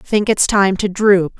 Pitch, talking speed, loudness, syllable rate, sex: 195 Hz, 215 wpm, -14 LUFS, 3.7 syllables/s, female